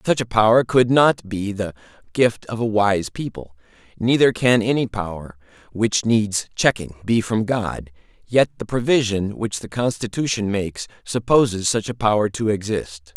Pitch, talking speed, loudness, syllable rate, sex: 110 Hz, 160 wpm, -20 LUFS, 4.6 syllables/s, male